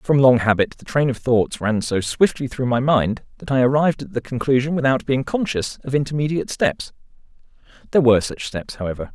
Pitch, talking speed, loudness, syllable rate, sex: 130 Hz, 195 wpm, -20 LUFS, 5.8 syllables/s, male